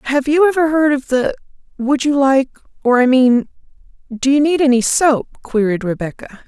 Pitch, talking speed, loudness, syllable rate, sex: 265 Hz, 160 wpm, -15 LUFS, 5.0 syllables/s, female